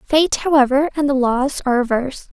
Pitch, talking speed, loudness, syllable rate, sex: 270 Hz, 175 wpm, -17 LUFS, 5.7 syllables/s, female